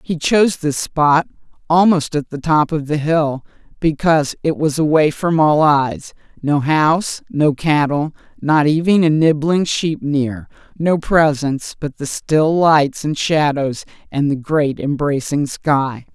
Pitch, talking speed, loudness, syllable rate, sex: 150 Hz, 145 wpm, -16 LUFS, 4.0 syllables/s, female